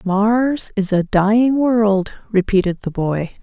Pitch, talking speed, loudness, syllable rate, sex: 205 Hz, 140 wpm, -17 LUFS, 3.6 syllables/s, female